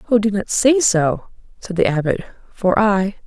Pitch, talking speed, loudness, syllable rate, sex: 200 Hz, 185 wpm, -17 LUFS, 4.6 syllables/s, female